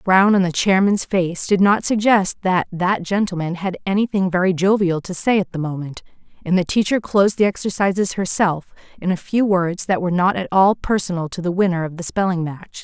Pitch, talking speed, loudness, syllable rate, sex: 185 Hz, 215 wpm, -19 LUFS, 5.5 syllables/s, female